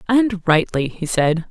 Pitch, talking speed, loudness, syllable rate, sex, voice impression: 180 Hz, 160 wpm, -18 LUFS, 3.7 syllables/s, female, feminine, middle-aged, tensed, powerful, slightly muffled, intellectual, friendly, unique, lively, slightly strict, slightly intense